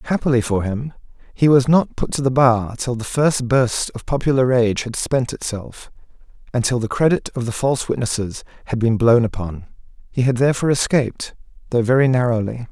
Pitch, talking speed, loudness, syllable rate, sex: 120 Hz, 185 wpm, -19 LUFS, 5.4 syllables/s, male